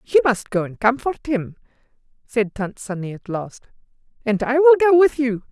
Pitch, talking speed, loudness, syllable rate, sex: 245 Hz, 185 wpm, -19 LUFS, 4.8 syllables/s, female